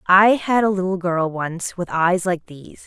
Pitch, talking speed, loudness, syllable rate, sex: 180 Hz, 210 wpm, -19 LUFS, 4.4 syllables/s, female